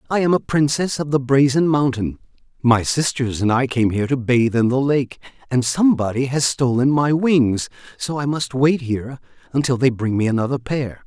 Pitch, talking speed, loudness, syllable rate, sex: 130 Hz, 195 wpm, -19 LUFS, 5.2 syllables/s, male